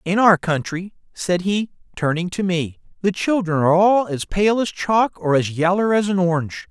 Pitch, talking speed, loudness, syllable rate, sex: 185 Hz, 195 wpm, -19 LUFS, 4.9 syllables/s, male